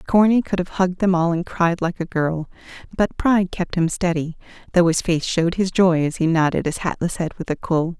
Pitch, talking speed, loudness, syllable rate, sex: 175 Hz, 235 wpm, -20 LUFS, 5.4 syllables/s, female